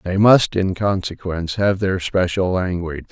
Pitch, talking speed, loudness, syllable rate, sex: 90 Hz, 155 wpm, -19 LUFS, 4.7 syllables/s, male